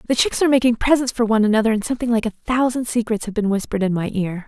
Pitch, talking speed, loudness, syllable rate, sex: 230 Hz, 270 wpm, -19 LUFS, 7.5 syllables/s, female